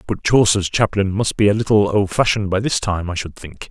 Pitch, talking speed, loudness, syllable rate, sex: 100 Hz, 225 wpm, -17 LUFS, 5.6 syllables/s, male